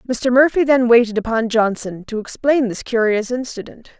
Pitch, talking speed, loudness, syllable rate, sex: 235 Hz, 165 wpm, -17 LUFS, 5.1 syllables/s, female